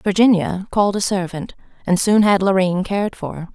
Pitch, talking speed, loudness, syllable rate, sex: 190 Hz, 170 wpm, -18 LUFS, 5.1 syllables/s, female